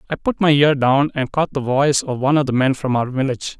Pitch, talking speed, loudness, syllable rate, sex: 135 Hz, 285 wpm, -18 LUFS, 6.3 syllables/s, male